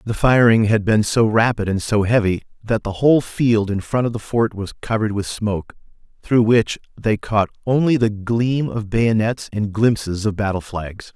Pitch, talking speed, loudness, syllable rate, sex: 110 Hz, 195 wpm, -19 LUFS, 4.8 syllables/s, male